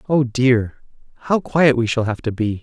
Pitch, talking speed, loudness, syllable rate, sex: 125 Hz, 205 wpm, -18 LUFS, 4.5 syllables/s, male